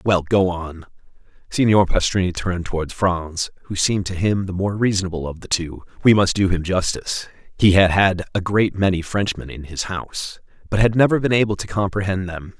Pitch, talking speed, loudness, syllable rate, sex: 95 Hz, 190 wpm, -20 LUFS, 5.5 syllables/s, male